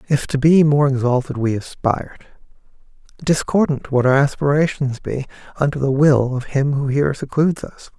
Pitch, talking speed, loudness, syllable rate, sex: 140 Hz, 160 wpm, -18 LUFS, 5.1 syllables/s, male